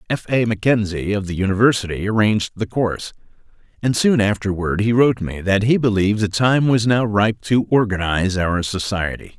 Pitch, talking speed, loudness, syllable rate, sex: 105 Hz, 175 wpm, -18 LUFS, 5.6 syllables/s, male